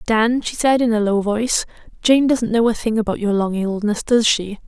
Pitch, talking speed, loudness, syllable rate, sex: 220 Hz, 230 wpm, -18 LUFS, 5.1 syllables/s, female